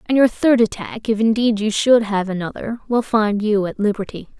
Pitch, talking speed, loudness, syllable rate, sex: 220 Hz, 205 wpm, -18 LUFS, 3.6 syllables/s, female